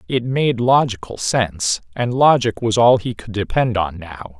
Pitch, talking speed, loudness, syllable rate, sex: 110 Hz, 165 wpm, -18 LUFS, 4.5 syllables/s, male